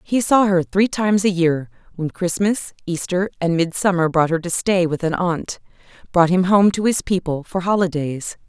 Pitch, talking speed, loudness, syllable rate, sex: 180 Hz, 190 wpm, -19 LUFS, 4.8 syllables/s, female